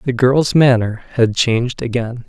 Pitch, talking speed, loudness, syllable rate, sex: 120 Hz, 160 wpm, -15 LUFS, 4.5 syllables/s, male